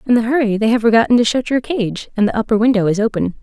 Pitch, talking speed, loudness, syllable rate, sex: 225 Hz, 280 wpm, -15 LUFS, 6.9 syllables/s, female